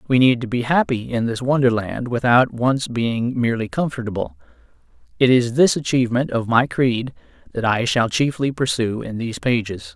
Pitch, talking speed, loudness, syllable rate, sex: 125 Hz, 170 wpm, -19 LUFS, 5.2 syllables/s, male